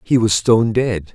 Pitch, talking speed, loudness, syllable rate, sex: 110 Hz, 210 wpm, -16 LUFS, 4.8 syllables/s, male